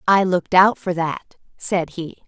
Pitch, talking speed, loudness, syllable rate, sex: 180 Hz, 185 wpm, -19 LUFS, 4.2 syllables/s, female